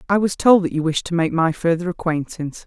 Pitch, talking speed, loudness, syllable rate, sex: 170 Hz, 250 wpm, -19 LUFS, 6.0 syllables/s, female